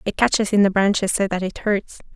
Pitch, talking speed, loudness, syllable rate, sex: 200 Hz, 250 wpm, -19 LUFS, 5.8 syllables/s, female